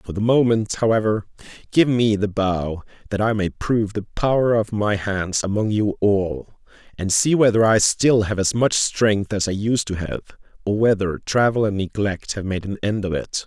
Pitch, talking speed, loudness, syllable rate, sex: 105 Hz, 200 wpm, -20 LUFS, 4.7 syllables/s, male